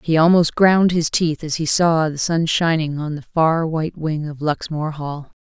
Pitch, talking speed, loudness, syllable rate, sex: 160 Hz, 210 wpm, -18 LUFS, 4.6 syllables/s, female